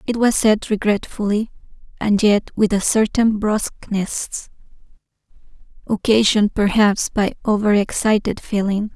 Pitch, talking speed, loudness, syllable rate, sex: 210 Hz, 105 wpm, -18 LUFS, 4.4 syllables/s, female